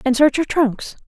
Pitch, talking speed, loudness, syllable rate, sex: 270 Hz, 220 wpm, -17 LUFS, 4.5 syllables/s, female